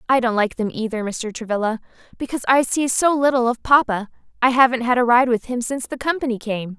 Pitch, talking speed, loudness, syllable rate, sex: 240 Hz, 220 wpm, -19 LUFS, 6.2 syllables/s, female